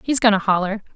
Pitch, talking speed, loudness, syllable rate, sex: 205 Hz, 250 wpm, -18 LUFS, 6.6 syllables/s, female